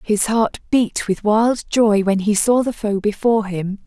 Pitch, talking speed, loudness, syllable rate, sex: 215 Hz, 200 wpm, -18 LUFS, 4.1 syllables/s, female